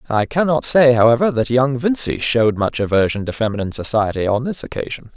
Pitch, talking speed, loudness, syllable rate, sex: 120 Hz, 185 wpm, -17 LUFS, 6.1 syllables/s, male